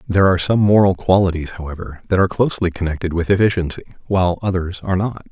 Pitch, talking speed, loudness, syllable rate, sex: 90 Hz, 180 wpm, -18 LUFS, 7.2 syllables/s, male